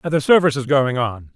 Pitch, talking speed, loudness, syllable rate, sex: 135 Hz, 220 wpm, -17 LUFS, 5.4 syllables/s, male